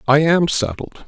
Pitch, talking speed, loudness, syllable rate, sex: 150 Hz, 170 wpm, -17 LUFS, 4.4 syllables/s, male